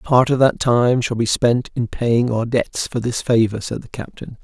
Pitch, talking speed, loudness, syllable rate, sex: 120 Hz, 230 wpm, -18 LUFS, 4.4 syllables/s, male